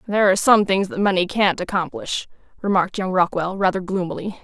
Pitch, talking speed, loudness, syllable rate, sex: 190 Hz, 175 wpm, -20 LUFS, 6.0 syllables/s, female